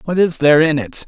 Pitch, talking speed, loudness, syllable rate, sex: 160 Hz, 280 wpm, -14 LUFS, 6.5 syllables/s, male